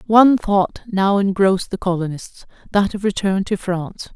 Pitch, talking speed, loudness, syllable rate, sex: 195 Hz, 160 wpm, -18 LUFS, 5.0 syllables/s, female